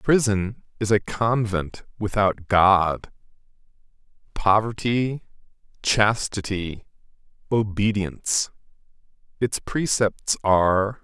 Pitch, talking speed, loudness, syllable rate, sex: 105 Hz, 70 wpm, -22 LUFS, 4.0 syllables/s, male